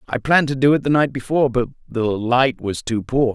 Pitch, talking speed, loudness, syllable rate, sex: 130 Hz, 250 wpm, -19 LUFS, 5.6 syllables/s, male